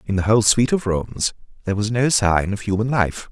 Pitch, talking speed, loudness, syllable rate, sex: 105 Hz, 235 wpm, -19 LUFS, 5.9 syllables/s, male